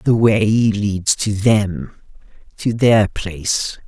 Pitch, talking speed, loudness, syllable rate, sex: 105 Hz, 125 wpm, -17 LUFS, 2.8 syllables/s, male